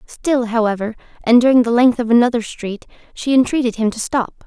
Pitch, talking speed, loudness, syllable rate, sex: 235 Hz, 190 wpm, -16 LUFS, 5.5 syllables/s, female